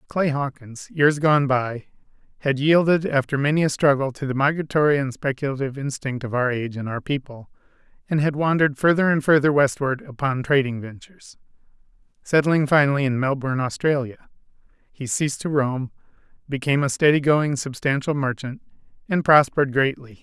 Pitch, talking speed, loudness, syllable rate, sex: 140 Hz, 150 wpm, -21 LUFS, 5.6 syllables/s, male